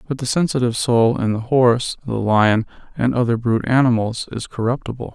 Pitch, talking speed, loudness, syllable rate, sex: 120 Hz, 175 wpm, -18 LUFS, 5.7 syllables/s, male